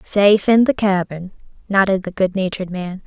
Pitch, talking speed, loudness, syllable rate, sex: 195 Hz, 155 wpm, -17 LUFS, 5.4 syllables/s, female